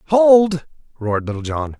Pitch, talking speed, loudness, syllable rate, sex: 150 Hz, 135 wpm, -16 LUFS, 4.9 syllables/s, male